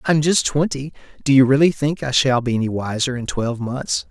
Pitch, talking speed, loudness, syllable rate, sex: 135 Hz, 205 wpm, -19 LUFS, 5.4 syllables/s, male